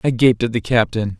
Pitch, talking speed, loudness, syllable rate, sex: 115 Hz, 250 wpm, -17 LUFS, 5.5 syllables/s, male